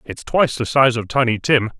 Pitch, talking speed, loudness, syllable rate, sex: 125 Hz, 235 wpm, -17 LUFS, 5.4 syllables/s, male